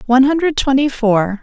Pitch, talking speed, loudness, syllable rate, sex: 260 Hz, 170 wpm, -14 LUFS, 5.4 syllables/s, female